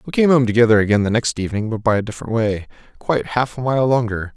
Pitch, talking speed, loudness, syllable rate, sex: 115 Hz, 250 wpm, -18 LUFS, 6.9 syllables/s, male